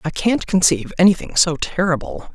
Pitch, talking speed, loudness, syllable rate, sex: 175 Hz, 155 wpm, -17 LUFS, 5.5 syllables/s, female